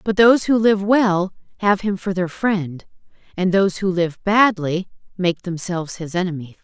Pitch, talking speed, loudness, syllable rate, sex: 190 Hz, 170 wpm, -19 LUFS, 4.8 syllables/s, female